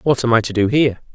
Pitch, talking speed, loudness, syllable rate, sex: 120 Hz, 315 wpm, -16 LUFS, 7.4 syllables/s, male